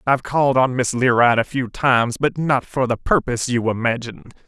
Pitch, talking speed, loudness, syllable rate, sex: 125 Hz, 200 wpm, -19 LUFS, 5.8 syllables/s, male